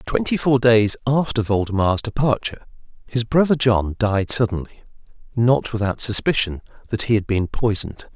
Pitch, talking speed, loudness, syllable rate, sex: 115 Hz, 140 wpm, -20 LUFS, 5.0 syllables/s, male